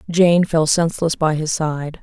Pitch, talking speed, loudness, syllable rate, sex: 160 Hz, 180 wpm, -17 LUFS, 4.4 syllables/s, female